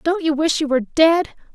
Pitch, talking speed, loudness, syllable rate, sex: 310 Hz, 235 wpm, -18 LUFS, 5.8 syllables/s, female